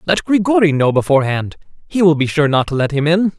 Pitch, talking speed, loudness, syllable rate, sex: 160 Hz, 230 wpm, -15 LUFS, 6.1 syllables/s, male